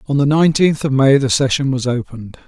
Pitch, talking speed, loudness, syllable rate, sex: 135 Hz, 220 wpm, -15 LUFS, 6.2 syllables/s, male